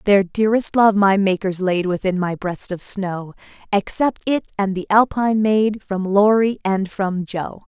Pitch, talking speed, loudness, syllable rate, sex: 200 Hz, 170 wpm, -19 LUFS, 4.3 syllables/s, female